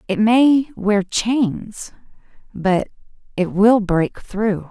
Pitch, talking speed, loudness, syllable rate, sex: 210 Hz, 115 wpm, -18 LUFS, 2.7 syllables/s, female